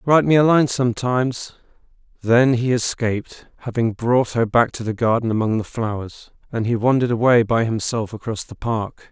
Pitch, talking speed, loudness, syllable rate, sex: 120 Hz, 180 wpm, -19 LUFS, 5.3 syllables/s, male